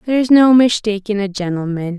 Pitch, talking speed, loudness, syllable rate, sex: 210 Hz, 150 wpm, -14 LUFS, 4.9 syllables/s, female